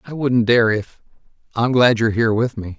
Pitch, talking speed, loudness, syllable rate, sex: 115 Hz, 215 wpm, -17 LUFS, 6.2 syllables/s, male